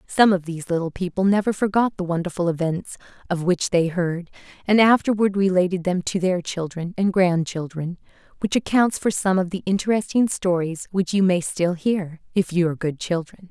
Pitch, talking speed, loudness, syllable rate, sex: 180 Hz, 180 wpm, -22 LUFS, 5.2 syllables/s, female